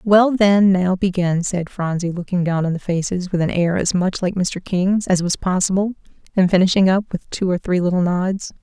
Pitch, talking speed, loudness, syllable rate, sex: 185 Hz, 215 wpm, -18 LUFS, 5.0 syllables/s, female